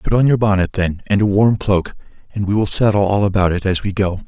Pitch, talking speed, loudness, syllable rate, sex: 100 Hz, 265 wpm, -16 LUFS, 5.8 syllables/s, male